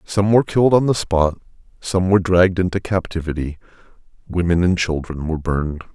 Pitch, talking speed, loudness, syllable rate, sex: 90 Hz, 160 wpm, -18 LUFS, 6.0 syllables/s, male